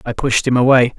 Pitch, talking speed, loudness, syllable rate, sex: 125 Hz, 245 wpm, -14 LUFS, 5.8 syllables/s, male